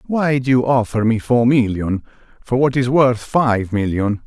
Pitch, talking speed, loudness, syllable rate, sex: 120 Hz, 185 wpm, -17 LUFS, 4.3 syllables/s, male